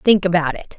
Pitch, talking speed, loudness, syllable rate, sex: 180 Hz, 230 wpm, -18 LUFS, 5.3 syllables/s, female